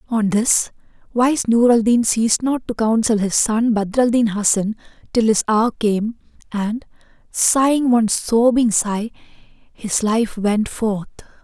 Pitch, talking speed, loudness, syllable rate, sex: 225 Hz, 150 wpm, -18 LUFS, 3.9 syllables/s, female